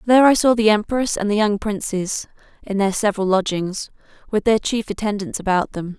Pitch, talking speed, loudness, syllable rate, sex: 205 Hz, 190 wpm, -19 LUFS, 5.4 syllables/s, female